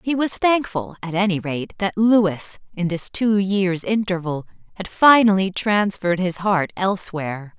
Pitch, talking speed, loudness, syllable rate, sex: 190 Hz, 150 wpm, -20 LUFS, 4.4 syllables/s, female